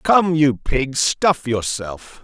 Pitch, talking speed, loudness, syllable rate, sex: 140 Hz, 135 wpm, -18 LUFS, 2.7 syllables/s, male